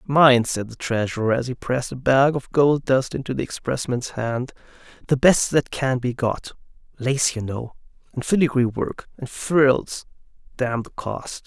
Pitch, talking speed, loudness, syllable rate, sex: 130 Hz, 160 wpm, -22 LUFS, 4.5 syllables/s, male